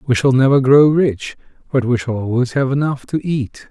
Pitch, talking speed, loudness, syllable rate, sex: 130 Hz, 210 wpm, -16 LUFS, 5.0 syllables/s, male